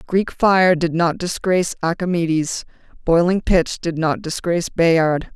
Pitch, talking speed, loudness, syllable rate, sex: 170 Hz, 135 wpm, -18 LUFS, 4.2 syllables/s, female